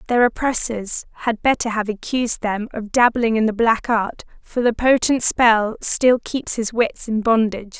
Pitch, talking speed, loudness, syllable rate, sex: 230 Hz, 175 wpm, -19 LUFS, 4.5 syllables/s, female